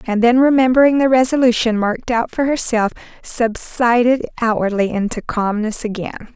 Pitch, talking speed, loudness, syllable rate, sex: 235 Hz, 130 wpm, -16 LUFS, 5.2 syllables/s, female